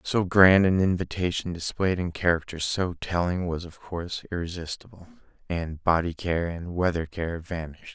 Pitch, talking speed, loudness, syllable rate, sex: 85 Hz, 150 wpm, -26 LUFS, 4.9 syllables/s, male